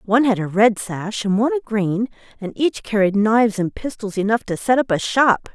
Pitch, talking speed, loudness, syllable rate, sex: 215 Hz, 225 wpm, -19 LUFS, 5.4 syllables/s, female